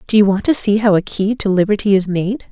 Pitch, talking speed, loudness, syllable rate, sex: 200 Hz, 285 wpm, -15 LUFS, 5.9 syllables/s, female